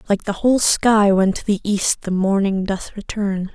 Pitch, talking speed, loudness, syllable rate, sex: 200 Hz, 205 wpm, -18 LUFS, 4.6 syllables/s, female